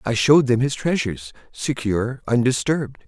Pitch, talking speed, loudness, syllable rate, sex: 125 Hz, 135 wpm, -20 LUFS, 5.5 syllables/s, male